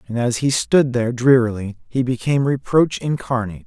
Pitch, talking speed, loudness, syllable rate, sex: 125 Hz, 165 wpm, -19 LUFS, 5.6 syllables/s, male